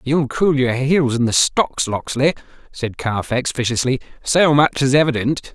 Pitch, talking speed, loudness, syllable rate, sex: 135 Hz, 160 wpm, -18 LUFS, 4.4 syllables/s, male